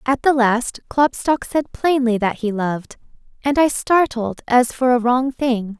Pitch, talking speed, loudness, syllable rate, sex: 250 Hz, 175 wpm, -18 LUFS, 4.2 syllables/s, female